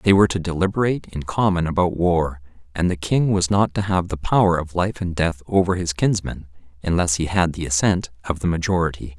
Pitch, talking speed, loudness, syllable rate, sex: 85 Hz, 210 wpm, -21 LUFS, 5.7 syllables/s, male